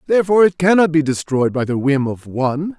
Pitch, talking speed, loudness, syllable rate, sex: 155 Hz, 215 wpm, -16 LUFS, 6.1 syllables/s, male